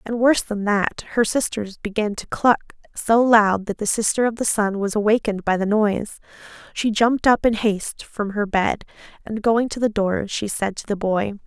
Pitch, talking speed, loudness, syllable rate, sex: 215 Hz, 210 wpm, -21 LUFS, 5.1 syllables/s, female